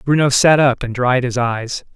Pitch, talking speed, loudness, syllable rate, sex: 130 Hz, 215 wpm, -15 LUFS, 4.5 syllables/s, male